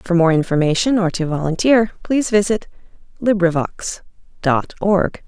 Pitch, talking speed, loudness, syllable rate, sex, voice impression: 185 Hz, 125 wpm, -18 LUFS, 4.9 syllables/s, female, feminine, slightly adult-like, slightly soft, sincere, slightly sweet, slightly kind